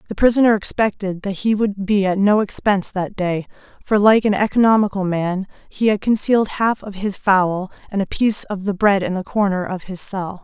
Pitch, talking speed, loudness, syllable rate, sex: 200 Hz, 205 wpm, -18 LUFS, 5.3 syllables/s, female